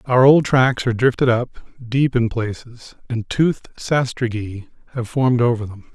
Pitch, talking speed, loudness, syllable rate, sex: 120 Hz, 160 wpm, -19 LUFS, 4.7 syllables/s, male